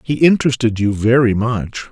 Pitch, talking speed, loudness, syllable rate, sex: 120 Hz, 155 wpm, -15 LUFS, 5.1 syllables/s, male